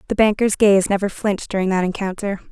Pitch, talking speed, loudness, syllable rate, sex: 195 Hz, 190 wpm, -19 LUFS, 6.2 syllables/s, female